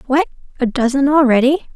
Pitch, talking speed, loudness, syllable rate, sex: 270 Hz, 135 wpm, -15 LUFS, 5.7 syllables/s, female